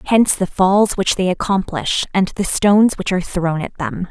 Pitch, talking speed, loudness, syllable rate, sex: 185 Hz, 205 wpm, -17 LUFS, 4.9 syllables/s, female